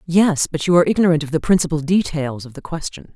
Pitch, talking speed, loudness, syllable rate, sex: 160 Hz, 230 wpm, -18 LUFS, 6.3 syllables/s, female